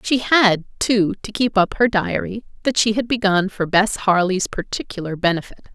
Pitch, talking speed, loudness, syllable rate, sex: 205 Hz, 180 wpm, -19 LUFS, 4.8 syllables/s, female